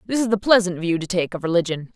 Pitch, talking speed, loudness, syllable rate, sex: 190 Hz, 275 wpm, -20 LUFS, 6.6 syllables/s, female